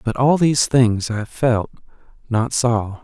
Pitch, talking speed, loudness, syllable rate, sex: 120 Hz, 140 wpm, -18 LUFS, 3.8 syllables/s, male